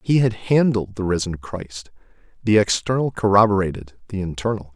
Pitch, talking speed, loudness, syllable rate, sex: 100 Hz, 140 wpm, -20 LUFS, 5.3 syllables/s, male